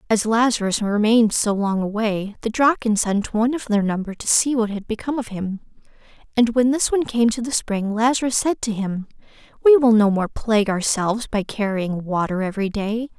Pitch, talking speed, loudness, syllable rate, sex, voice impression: 220 Hz, 195 wpm, -20 LUFS, 5.5 syllables/s, female, feminine, slightly adult-like, slightly soft, slightly cute, friendly, slightly sweet, kind